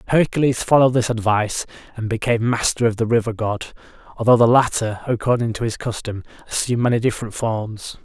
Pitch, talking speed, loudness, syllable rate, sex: 115 Hz, 165 wpm, -19 LUFS, 6.3 syllables/s, male